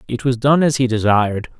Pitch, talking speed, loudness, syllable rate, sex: 125 Hz, 225 wpm, -16 LUFS, 5.8 syllables/s, male